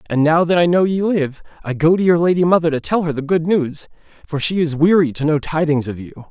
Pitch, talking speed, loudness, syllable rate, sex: 160 Hz, 265 wpm, -17 LUFS, 5.8 syllables/s, male